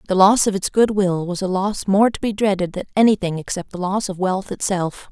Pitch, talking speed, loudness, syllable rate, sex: 195 Hz, 245 wpm, -19 LUFS, 5.4 syllables/s, female